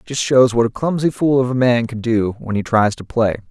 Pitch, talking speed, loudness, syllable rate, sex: 120 Hz, 275 wpm, -17 LUFS, 5.1 syllables/s, male